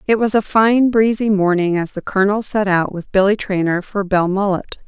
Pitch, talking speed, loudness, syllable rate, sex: 200 Hz, 195 wpm, -16 LUFS, 5.4 syllables/s, female